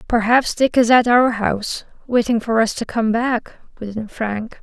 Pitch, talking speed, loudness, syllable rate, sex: 230 Hz, 195 wpm, -18 LUFS, 4.4 syllables/s, female